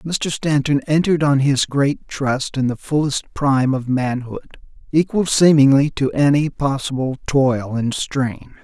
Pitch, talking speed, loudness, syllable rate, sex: 140 Hz, 145 wpm, -18 LUFS, 4.2 syllables/s, male